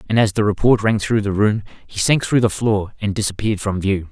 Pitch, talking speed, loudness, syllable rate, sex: 105 Hz, 250 wpm, -18 LUFS, 5.7 syllables/s, male